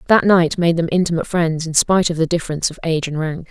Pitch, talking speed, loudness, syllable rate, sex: 165 Hz, 255 wpm, -17 LUFS, 7.0 syllables/s, female